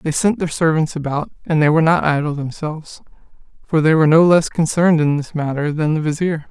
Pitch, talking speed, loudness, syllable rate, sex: 155 Hz, 210 wpm, -17 LUFS, 5.9 syllables/s, male